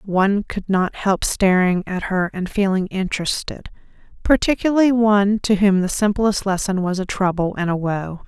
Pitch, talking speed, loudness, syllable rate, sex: 195 Hz, 165 wpm, -19 LUFS, 4.9 syllables/s, female